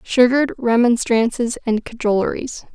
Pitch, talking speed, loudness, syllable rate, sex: 235 Hz, 90 wpm, -18 LUFS, 4.9 syllables/s, female